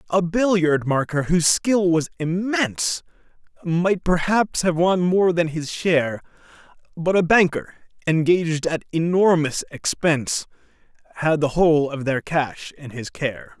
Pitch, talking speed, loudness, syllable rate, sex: 165 Hz, 135 wpm, -20 LUFS, 4.3 syllables/s, male